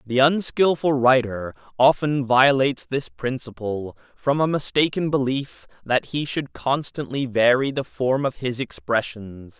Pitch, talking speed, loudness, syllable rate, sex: 130 Hz, 130 wpm, -22 LUFS, 4.2 syllables/s, male